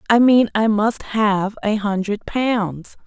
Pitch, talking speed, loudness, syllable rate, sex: 215 Hz, 155 wpm, -18 LUFS, 3.3 syllables/s, female